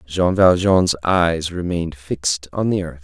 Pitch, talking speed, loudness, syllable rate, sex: 85 Hz, 160 wpm, -18 LUFS, 4.3 syllables/s, male